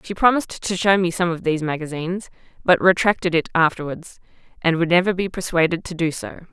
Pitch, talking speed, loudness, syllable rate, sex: 175 Hz, 195 wpm, -20 LUFS, 6.1 syllables/s, female